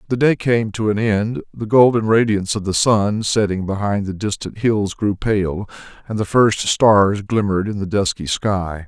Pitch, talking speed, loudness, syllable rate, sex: 105 Hz, 190 wpm, -18 LUFS, 4.5 syllables/s, male